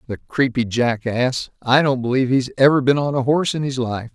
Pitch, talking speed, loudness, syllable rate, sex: 130 Hz, 230 wpm, -19 LUFS, 5.5 syllables/s, male